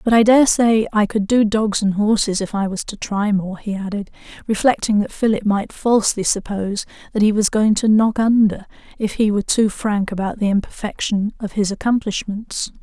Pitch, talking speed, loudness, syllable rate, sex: 210 Hz, 195 wpm, -18 LUFS, 5.2 syllables/s, female